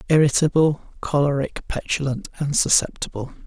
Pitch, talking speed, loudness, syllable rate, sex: 145 Hz, 85 wpm, -21 LUFS, 5.3 syllables/s, male